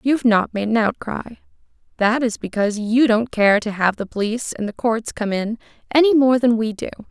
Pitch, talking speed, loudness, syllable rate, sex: 225 Hz, 220 wpm, -19 LUFS, 5.4 syllables/s, female